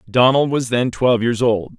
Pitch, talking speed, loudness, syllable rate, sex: 120 Hz, 200 wpm, -17 LUFS, 4.9 syllables/s, male